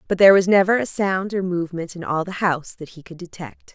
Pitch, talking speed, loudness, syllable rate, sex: 175 Hz, 255 wpm, -19 LUFS, 6.2 syllables/s, female